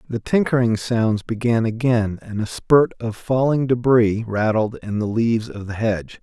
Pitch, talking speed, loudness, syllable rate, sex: 115 Hz, 175 wpm, -20 LUFS, 4.6 syllables/s, male